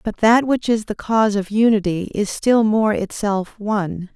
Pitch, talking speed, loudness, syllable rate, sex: 210 Hz, 190 wpm, -18 LUFS, 4.5 syllables/s, female